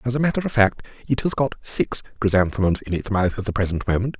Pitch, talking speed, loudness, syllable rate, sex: 110 Hz, 245 wpm, -21 LUFS, 6.4 syllables/s, male